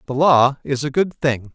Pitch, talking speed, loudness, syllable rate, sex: 135 Hz, 235 wpm, -18 LUFS, 4.4 syllables/s, male